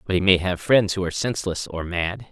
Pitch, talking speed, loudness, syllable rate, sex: 95 Hz, 260 wpm, -22 LUFS, 6.0 syllables/s, male